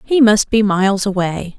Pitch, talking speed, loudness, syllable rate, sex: 205 Hz, 190 wpm, -15 LUFS, 4.7 syllables/s, female